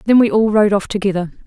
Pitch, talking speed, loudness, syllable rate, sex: 205 Hz, 245 wpm, -15 LUFS, 6.7 syllables/s, female